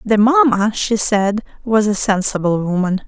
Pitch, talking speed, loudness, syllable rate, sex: 210 Hz, 155 wpm, -16 LUFS, 4.4 syllables/s, female